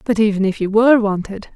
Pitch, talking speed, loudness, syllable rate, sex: 210 Hz, 230 wpm, -16 LUFS, 6.5 syllables/s, female